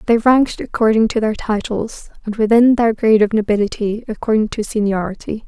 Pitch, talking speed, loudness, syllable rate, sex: 220 Hz, 165 wpm, -16 LUFS, 5.7 syllables/s, female